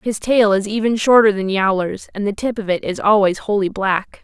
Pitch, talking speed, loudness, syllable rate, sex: 205 Hz, 225 wpm, -17 LUFS, 5.1 syllables/s, female